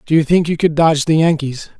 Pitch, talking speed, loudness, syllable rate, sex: 155 Hz, 270 wpm, -14 LUFS, 6.3 syllables/s, male